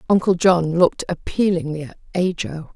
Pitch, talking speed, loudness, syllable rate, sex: 170 Hz, 130 wpm, -20 LUFS, 5.3 syllables/s, female